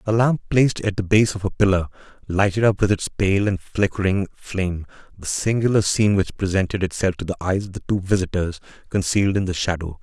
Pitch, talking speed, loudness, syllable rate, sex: 95 Hz, 205 wpm, -21 LUFS, 5.8 syllables/s, male